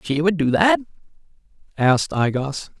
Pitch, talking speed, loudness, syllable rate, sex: 160 Hz, 150 wpm, -19 LUFS, 4.8 syllables/s, male